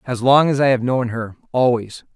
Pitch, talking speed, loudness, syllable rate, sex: 125 Hz, 195 wpm, -18 LUFS, 5.0 syllables/s, male